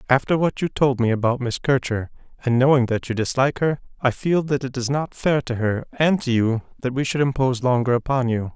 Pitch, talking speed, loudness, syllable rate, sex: 130 Hz, 230 wpm, -21 LUFS, 5.7 syllables/s, male